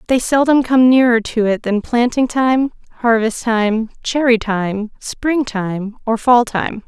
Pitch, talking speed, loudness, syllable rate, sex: 235 Hz, 155 wpm, -16 LUFS, 3.8 syllables/s, female